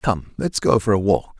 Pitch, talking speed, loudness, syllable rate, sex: 100 Hz, 260 wpm, -20 LUFS, 4.7 syllables/s, male